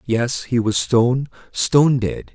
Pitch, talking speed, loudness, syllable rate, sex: 125 Hz, 155 wpm, -18 LUFS, 4.0 syllables/s, male